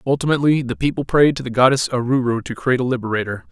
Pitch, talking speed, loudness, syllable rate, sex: 130 Hz, 205 wpm, -18 LUFS, 7.3 syllables/s, male